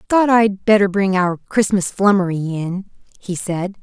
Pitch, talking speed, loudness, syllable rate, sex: 195 Hz, 155 wpm, -17 LUFS, 4.2 syllables/s, female